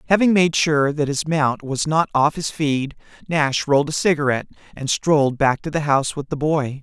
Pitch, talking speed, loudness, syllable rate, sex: 150 Hz, 210 wpm, -19 LUFS, 5.2 syllables/s, male